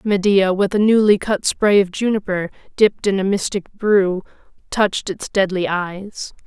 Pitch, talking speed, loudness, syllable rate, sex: 195 Hz, 160 wpm, -18 LUFS, 4.5 syllables/s, female